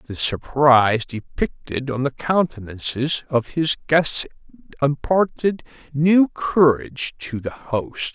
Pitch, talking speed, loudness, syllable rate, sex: 140 Hz, 110 wpm, -20 LUFS, 3.6 syllables/s, male